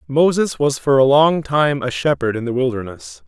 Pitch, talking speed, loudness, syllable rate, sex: 135 Hz, 200 wpm, -17 LUFS, 4.8 syllables/s, male